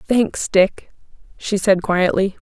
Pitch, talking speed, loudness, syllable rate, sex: 195 Hz, 95 wpm, -18 LUFS, 3.2 syllables/s, female